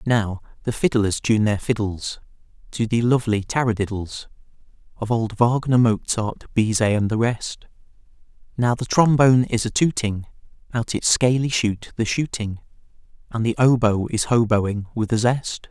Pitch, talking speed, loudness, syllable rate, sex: 115 Hz, 145 wpm, -21 LUFS, 4.7 syllables/s, male